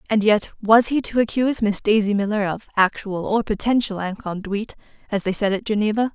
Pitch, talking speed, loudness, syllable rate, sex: 210 Hz, 185 wpm, -21 LUFS, 5.8 syllables/s, female